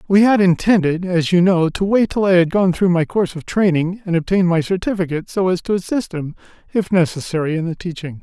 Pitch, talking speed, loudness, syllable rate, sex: 180 Hz, 225 wpm, -17 LUFS, 6.0 syllables/s, male